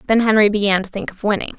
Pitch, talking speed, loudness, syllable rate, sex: 205 Hz, 265 wpm, -17 LUFS, 6.7 syllables/s, female